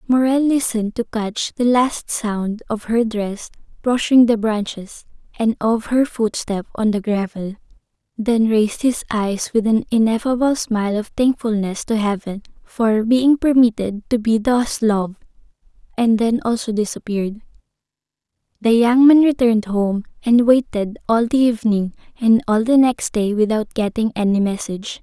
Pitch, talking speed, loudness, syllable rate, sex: 225 Hz, 150 wpm, -18 LUFS, 4.6 syllables/s, female